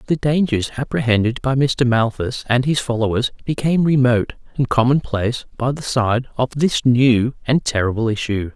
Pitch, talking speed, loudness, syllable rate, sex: 125 Hz, 155 wpm, -18 LUFS, 5.1 syllables/s, male